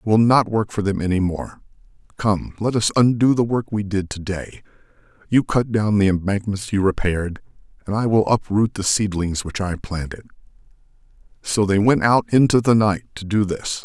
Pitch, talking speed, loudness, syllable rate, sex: 105 Hz, 185 wpm, -20 LUFS, 5.1 syllables/s, male